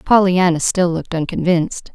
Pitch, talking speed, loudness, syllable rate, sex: 175 Hz, 125 wpm, -17 LUFS, 5.4 syllables/s, female